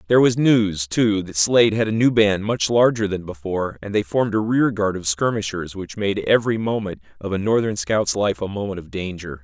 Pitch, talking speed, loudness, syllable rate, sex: 100 Hz, 225 wpm, -20 LUFS, 5.4 syllables/s, male